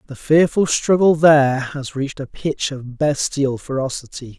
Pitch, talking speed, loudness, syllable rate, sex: 140 Hz, 150 wpm, -18 LUFS, 4.5 syllables/s, male